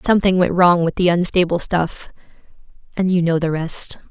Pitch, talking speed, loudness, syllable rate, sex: 175 Hz, 160 wpm, -17 LUFS, 5.2 syllables/s, female